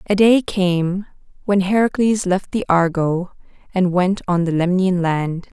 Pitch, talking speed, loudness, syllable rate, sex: 185 Hz, 150 wpm, -18 LUFS, 4.1 syllables/s, female